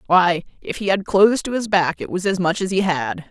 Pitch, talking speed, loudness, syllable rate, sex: 180 Hz, 270 wpm, -19 LUFS, 5.4 syllables/s, male